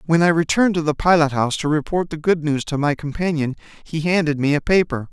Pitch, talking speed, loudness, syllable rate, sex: 155 Hz, 235 wpm, -19 LUFS, 6.2 syllables/s, male